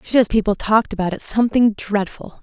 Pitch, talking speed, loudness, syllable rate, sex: 215 Hz, 200 wpm, -18 LUFS, 6.1 syllables/s, female